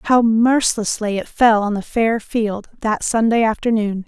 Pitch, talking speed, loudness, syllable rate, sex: 220 Hz, 160 wpm, -18 LUFS, 4.4 syllables/s, female